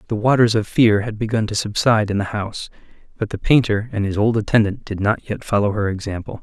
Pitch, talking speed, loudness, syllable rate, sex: 105 Hz, 225 wpm, -19 LUFS, 6.1 syllables/s, male